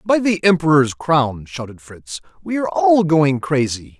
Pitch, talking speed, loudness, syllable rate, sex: 140 Hz, 165 wpm, -16 LUFS, 4.4 syllables/s, male